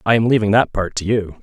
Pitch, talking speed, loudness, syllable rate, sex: 105 Hz, 295 wpm, -17 LUFS, 6.3 syllables/s, male